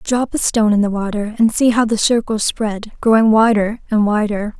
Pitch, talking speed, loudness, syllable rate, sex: 215 Hz, 210 wpm, -16 LUFS, 5.2 syllables/s, female